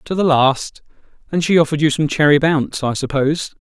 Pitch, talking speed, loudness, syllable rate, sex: 150 Hz, 200 wpm, -16 LUFS, 6.0 syllables/s, male